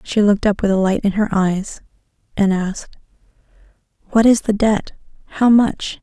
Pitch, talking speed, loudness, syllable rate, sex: 205 Hz, 170 wpm, -17 LUFS, 5.0 syllables/s, female